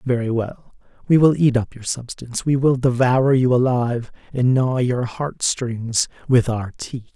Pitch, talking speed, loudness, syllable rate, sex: 125 Hz, 175 wpm, -19 LUFS, 4.4 syllables/s, male